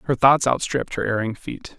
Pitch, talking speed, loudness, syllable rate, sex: 125 Hz, 200 wpm, -21 LUFS, 5.5 syllables/s, male